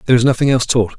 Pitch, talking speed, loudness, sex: 125 Hz, 305 wpm, -14 LUFS, male